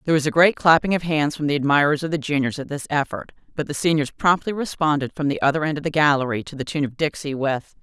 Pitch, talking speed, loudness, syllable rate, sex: 150 Hz, 260 wpm, -21 LUFS, 6.5 syllables/s, female